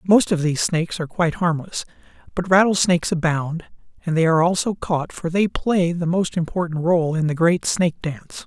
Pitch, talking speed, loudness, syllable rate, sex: 170 Hz, 190 wpm, -20 LUFS, 5.6 syllables/s, male